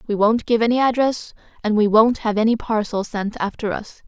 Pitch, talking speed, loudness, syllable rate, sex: 220 Hz, 205 wpm, -19 LUFS, 5.3 syllables/s, female